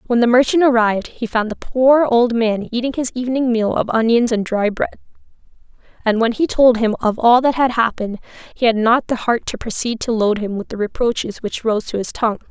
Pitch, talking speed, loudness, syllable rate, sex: 235 Hz, 225 wpm, -17 LUFS, 5.5 syllables/s, female